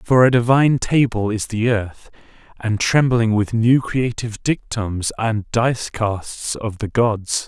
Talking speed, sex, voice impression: 150 wpm, male, masculine, adult-like, tensed, powerful, clear, slightly raspy, slightly cool, intellectual, friendly, wild, lively, slightly intense